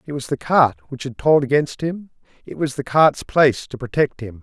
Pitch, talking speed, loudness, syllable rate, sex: 140 Hz, 230 wpm, -19 LUFS, 5.2 syllables/s, male